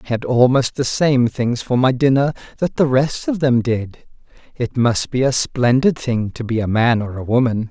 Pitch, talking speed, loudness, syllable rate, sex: 125 Hz, 220 wpm, -17 LUFS, 4.7 syllables/s, male